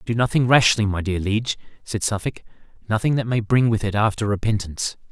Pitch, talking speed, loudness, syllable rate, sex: 110 Hz, 190 wpm, -21 LUFS, 6.0 syllables/s, male